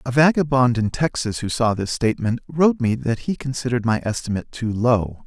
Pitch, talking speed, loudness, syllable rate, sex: 125 Hz, 195 wpm, -21 LUFS, 5.8 syllables/s, male